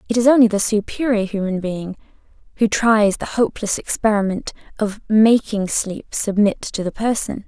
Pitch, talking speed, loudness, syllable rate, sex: 210 Hz, 155 wpm, -18 LUFS, 4.9 syllables/s, female